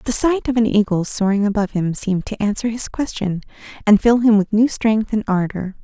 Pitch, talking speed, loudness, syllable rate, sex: 210 Hz, 215 wpm, -18 LUFS, 5.5 syllables/s, female